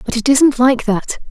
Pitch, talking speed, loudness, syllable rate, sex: 250 Hz, 230 wpm, -14 LUFS, 4.4 syllables/s, female